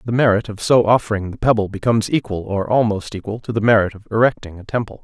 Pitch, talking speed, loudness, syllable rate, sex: 110 Hz, 225 wpm, -18 LUFS, 6.6 syllables/s, male